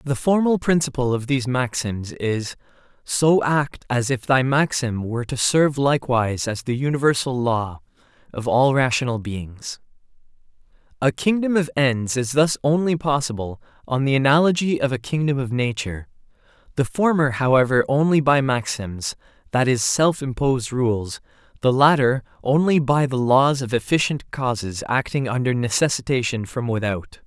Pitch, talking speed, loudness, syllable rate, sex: 130 Hz, 145 wpm, -21 LUFS, 4.7 syllables/s, male